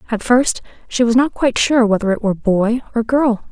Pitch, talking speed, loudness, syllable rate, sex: 230 Hz, 220 wpm, -16 LUFS, 5.6 syllables/s, female